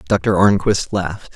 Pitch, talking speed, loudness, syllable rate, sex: 95 Hz, 135 wpm, -17 LUFS, 4.0 syllables/s, male